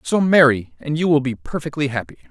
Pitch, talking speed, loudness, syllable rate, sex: 145 Hz, 210 wpm, -18 LUFS, 5.8 syllables/s, male